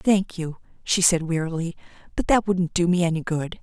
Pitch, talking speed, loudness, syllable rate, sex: 170 Hz, 200 wpm, -23 LUFS, 5.1 syllables/s, female